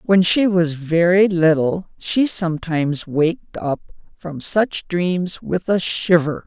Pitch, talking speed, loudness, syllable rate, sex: 175 Hz, 140 wpm, -18 LUFS, 3.7 syllables/s, female